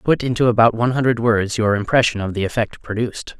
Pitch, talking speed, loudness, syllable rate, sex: 115 Hz, 210 wpm, -18 LUFS, 6.4 syllables/s, male